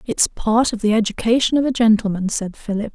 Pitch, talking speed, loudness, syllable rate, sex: 220 Hz, 205 wpm, -18 LUFS, 5.7 syllables/s, female